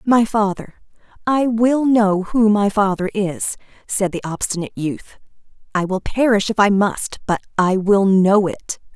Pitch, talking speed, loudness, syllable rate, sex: 205 Hz, 155 wpm, -18 LUFS, 4.2 syllables/s, female